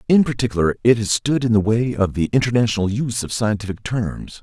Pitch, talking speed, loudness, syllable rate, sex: 110 Hz, 205 wpm, -19 LUFS, 6.0 syllables/s, male